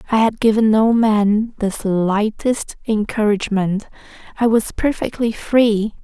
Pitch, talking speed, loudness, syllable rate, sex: 215 Hz, 120 wpm, -17 LUFS, 3.9 syllables/s, female